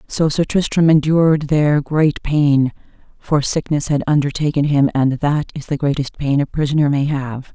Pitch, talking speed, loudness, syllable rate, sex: 145 Hz, 175 wpm, -17 LUFS, 4.8 syllables/s, female